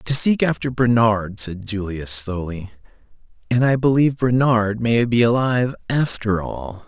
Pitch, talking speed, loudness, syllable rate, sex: 115 Hz, 140 wpm, -19 LUFS, 4.4 syllables/s, male